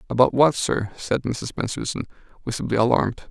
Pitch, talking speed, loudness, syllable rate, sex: 120 Hz, 145 wpm, -22 LUFS, 5.7 syllables/s, male